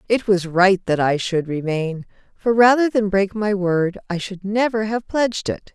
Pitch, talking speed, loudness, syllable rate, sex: 200 Hz, 200 wpm, -19 LUFS, 4.4 syllables/s, female